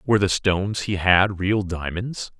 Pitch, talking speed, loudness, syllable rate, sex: 95 Hz, 175 wpm, -21 LUFS, 4.3 syllables/s, male